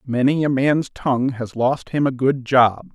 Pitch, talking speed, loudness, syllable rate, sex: 130 Hz, 205 wpm, -19 LUFS, 4.3 syllables/s, male